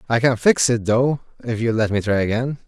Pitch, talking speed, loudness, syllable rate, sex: 120 Hz, 245 wpm, -19 LUFS, 5.4 syllables/s, male